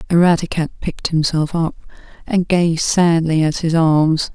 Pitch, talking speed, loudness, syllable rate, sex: 165 Hz, 140 wpm, -17 LUFS, 4.7 syllables/s, female